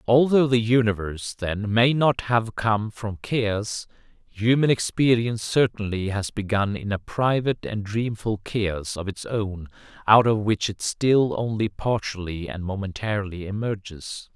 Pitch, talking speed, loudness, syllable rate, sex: 110 Hz, 140 wpm, -24 LUFS, 4.3 syllables/s, male